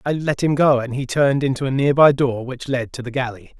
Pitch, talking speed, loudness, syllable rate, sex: 135 Hz, 265 wpm, -19 LUFS, 5.8 syllables/s, male